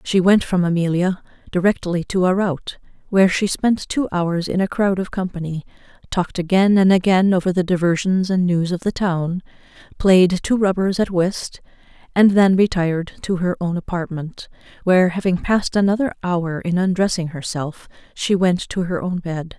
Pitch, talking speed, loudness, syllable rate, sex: 180 Hz, 170 wpm, -19 LUFS, 4.9 syllables/s, female